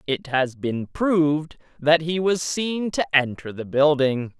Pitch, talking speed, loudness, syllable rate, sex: 150 Hz, 165 wpm, -22 LUFS, 3.8 syllables/s, male